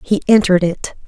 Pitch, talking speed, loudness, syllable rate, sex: 190 Hz, 170 wpm, -14 LUFS, 6.1 syllables/s, female